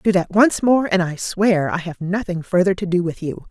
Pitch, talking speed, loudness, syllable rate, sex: 185 Hz, 255 wpm, -19 LUFS, 4.9 syllables/s, female